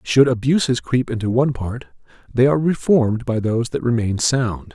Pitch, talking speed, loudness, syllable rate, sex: 125 Hz, 175 wpm, -19 LUFS, 5.5 syllables/s, male